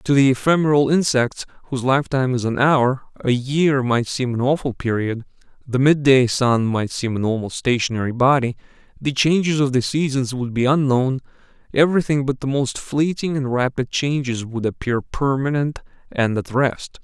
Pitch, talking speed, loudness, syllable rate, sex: 130 Hz, 170 wpm, -19 LUFS, 5.0 syllables/s, male